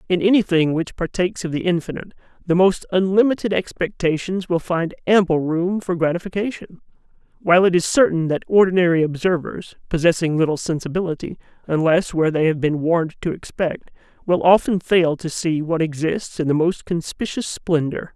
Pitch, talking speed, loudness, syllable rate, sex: 170 Hz, 155 wpm, -19 LUFS, 5.6 syllables/s, male